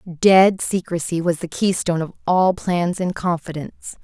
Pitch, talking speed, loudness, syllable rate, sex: 175 Hz, 150 wpm, -19 LUFS, 4.6 syllables/s, female